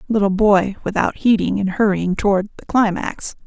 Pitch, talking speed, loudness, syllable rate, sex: 200 Hz, 155 wpm, -18 LUFS, 1.9 syllables/s, female